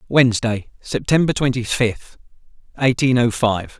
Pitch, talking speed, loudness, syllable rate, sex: 120 Hz, 110 wpm, -19 LUFS, 4.4 syllables/s, male